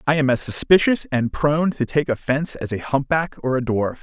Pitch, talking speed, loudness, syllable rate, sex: 135 Hz, 225 wpm, -20 LUFS, 5.5 syllables/s, male